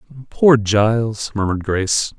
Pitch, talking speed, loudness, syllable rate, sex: 110 Hz, 110 wpm, -17 LUFS, 5.2 syllables/s, male